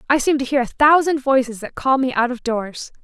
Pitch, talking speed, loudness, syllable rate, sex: 260 Hz, 255 wpm, -18 LUFS, 5.4 syllables/s, female